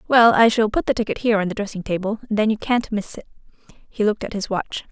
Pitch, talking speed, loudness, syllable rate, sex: 215 Hz, 270 wpm, -20 LUFS, 6.6 syllables/s, female